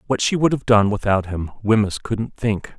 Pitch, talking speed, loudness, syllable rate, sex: 110 Hz, 215 wpm, -20 LUFS, 4.8 syllables/s, male